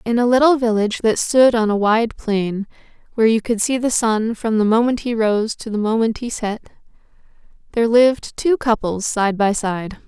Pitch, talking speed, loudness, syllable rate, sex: 225 Hz, 195 wpm, -18 LUFS, 5.1 syllables/s, female